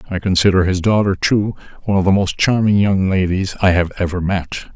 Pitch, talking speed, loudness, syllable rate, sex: 95 Hz, 200 wpm, -16 LUFS, 5.8 syllables/s, male